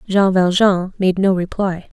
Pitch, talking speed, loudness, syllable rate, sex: 190 Hz, 150 wpm, -16 LUFS, 4.1 syllables/s, female